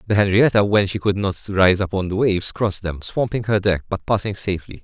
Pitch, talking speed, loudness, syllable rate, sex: 100 Hz, 225 wpm, -19 LUFS, 6.0 syllables/s, male